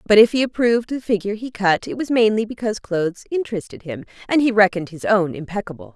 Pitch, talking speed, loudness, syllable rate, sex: 205 Hz, 210 wpm, -20 LUFS, 6.7 syllables/s, female